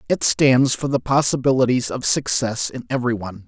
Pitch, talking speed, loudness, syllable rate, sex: 125 Hz, 170 wpm, -19 LUFS, 5.6 syllables/s, male